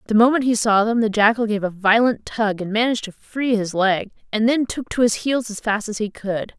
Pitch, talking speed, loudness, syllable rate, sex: 220 Hz, 255 wpm, -20 LUFS, 5.3 syllables/s, female